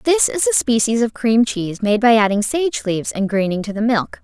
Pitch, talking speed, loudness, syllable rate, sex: 230 Hz, 240 wpm, -17 LUFS, 5.5 syllables/s, female